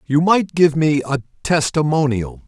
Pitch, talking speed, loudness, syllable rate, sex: 150 Hz, 145 wpm, -17 LUFS, 4.3 syllables/s, male